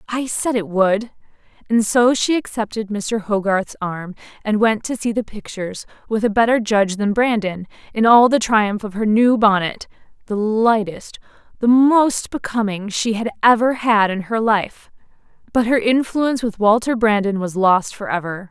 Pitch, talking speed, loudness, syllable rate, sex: 215 Hz, 170 wpm, -18 LUFS, 4.6 syllables/s, female